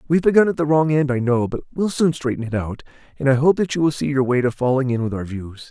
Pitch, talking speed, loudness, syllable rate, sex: 140 Hz, 305 wpm, -19 LUFS, 6.5 syllables/s, male